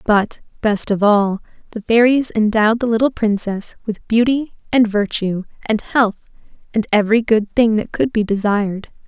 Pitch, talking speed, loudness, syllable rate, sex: 220 Hz, 160 wpm, -17 LUFS, 4.8 syllables/s, female